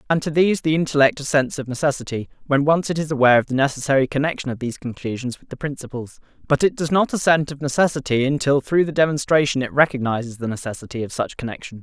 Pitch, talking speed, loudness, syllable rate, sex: 140 Hz, 210 wpm, -20 LUFS, 6.8 syllables/s, male